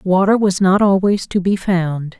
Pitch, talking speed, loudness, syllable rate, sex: 190 Hz, 190 wpm, -15 LUFS, 4.2 syllables/s, female